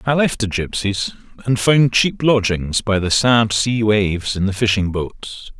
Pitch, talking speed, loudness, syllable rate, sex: 110 Hz, 180 wpm, -17 LUFS, 4.1 syllables/s, male